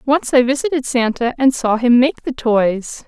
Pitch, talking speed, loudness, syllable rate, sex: 250 Hz, 195 wpm, -16 LUFS, 4.5 syllables/s, female